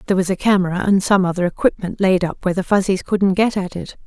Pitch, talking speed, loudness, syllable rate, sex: 190 Hz, 250 wpm, -18 LUFS, 6.5 syllables/s, female